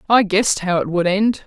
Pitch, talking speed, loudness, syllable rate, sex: 195 Hz, 245 wpm, -17 LUFS, 5.4 syllables/s, female